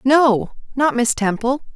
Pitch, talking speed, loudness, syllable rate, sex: 255 Hz, 135 wpm, -18 LUFS, 3.9 syllables/s, female